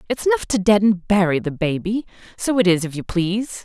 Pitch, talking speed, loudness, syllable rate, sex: 195 Hz, 230 wpm, -19 LUFS, 5.7 syllables/s, female